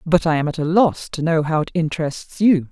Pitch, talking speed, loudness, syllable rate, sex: 160 Hz, 265 wpm, -19 LUFS, 5.4 syllables/s, female